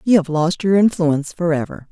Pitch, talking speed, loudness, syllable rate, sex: 170 Hz, 190 wpm, -17 LUFS, 5.5 syllables/s, female